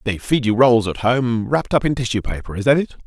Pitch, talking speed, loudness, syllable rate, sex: 120 Hz, 275 wpm, -18 LUFS, 5.9 syllables/s, male